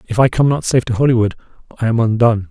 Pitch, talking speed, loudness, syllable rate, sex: 115 Hz, 240 wpm, -15 LUFS, 7.5 syllables/s, male